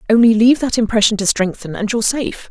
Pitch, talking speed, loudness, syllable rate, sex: 225 Hz, 215 wpm, -15 LUFS, 6.9 syllables/s, female